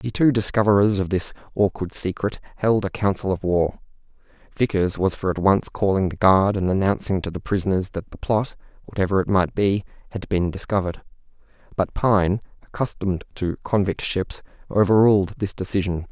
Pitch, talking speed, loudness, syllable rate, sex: 95 Hz, 155 wpm, -22 LUFS, 5.4 syllables/s, male